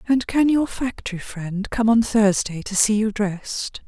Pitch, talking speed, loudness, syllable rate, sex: 215 Hz, 185 wpm, -21 LUFS, 4.4 syllables/s, female